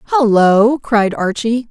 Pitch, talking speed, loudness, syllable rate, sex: 230 Hz, 105 wpm, -13 LUFS, 3.9 syllables/s, female